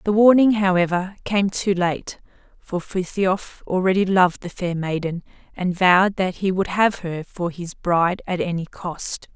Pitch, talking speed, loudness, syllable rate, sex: 185 Hz, 165 wpm, -21 LUFS, 4.5 syllables/s, female